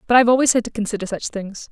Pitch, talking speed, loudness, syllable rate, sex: 225 Hz, 280 wpm, -19 LUFS, 7.7 syllables/s, female